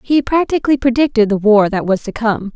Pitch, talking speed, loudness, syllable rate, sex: 235 Hz, 210 wpm, -14 LUFS, 5.7 syllables/s, female